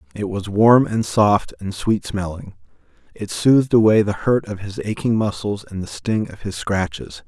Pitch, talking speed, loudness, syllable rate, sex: 105 Hz, 190 wpm, -19 LUFS, 4.6 syllables/s, male